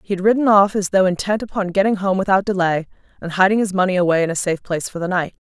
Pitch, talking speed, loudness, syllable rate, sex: 190 Hz, 265 wpm, -18 LUFS, 7.1 syllables/s, female